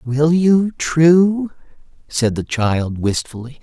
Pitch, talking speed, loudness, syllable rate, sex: 145 Hz, 115 wpm, -16 LUFS, 3.0 syllables/s, male